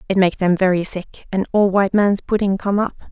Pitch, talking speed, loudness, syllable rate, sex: 195 Hz, 230 wpm, -18 LUFS, 5.5 syllables/s, female